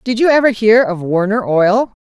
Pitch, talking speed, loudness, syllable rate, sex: 220 Hz, 205 wpm, -13 LUFS, 4.8 syllables/s, female